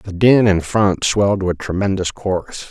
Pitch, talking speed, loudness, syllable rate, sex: 100 Hz, 200 wpm, -17 LUFS, 4.9 syllables/s, male